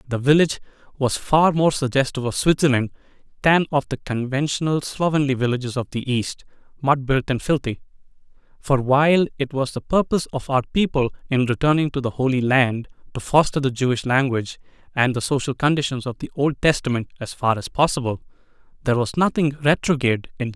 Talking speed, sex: 175 wpm, male